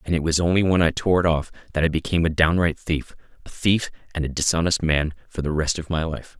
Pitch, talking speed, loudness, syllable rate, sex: 80 Hz, 255 wpm, -22 LUFS, 6.1 syllables/s, male